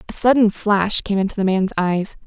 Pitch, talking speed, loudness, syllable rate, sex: 200 Hz, 210 wpm, -18 LUFS, 5.2 syllables/s, female